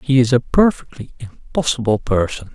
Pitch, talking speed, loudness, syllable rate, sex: 125 Hz, 140 wpm, -17 LUFS, 5.1 syllables/s, male